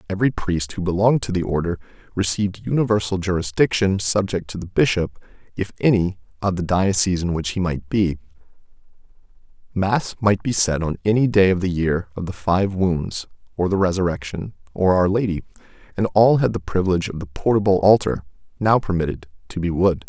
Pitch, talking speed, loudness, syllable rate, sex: 95 Hz, 175 wpm, -20 LUFS, 5.8 syllables/s, male